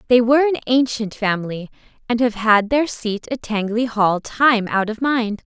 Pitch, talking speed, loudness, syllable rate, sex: 225 Hz, 185 wpm, -19 LUFS, 4.7 syllables/s, female